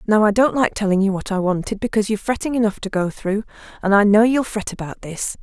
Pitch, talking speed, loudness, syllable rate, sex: 210 Hz, 255 wpm, -19 LUFS, 6.4 syllables/s, female